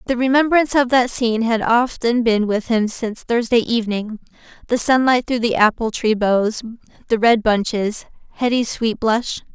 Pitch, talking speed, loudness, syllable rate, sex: 230 Hz, 165 wpm, -18 LUFS, 4.9 syllables/s, female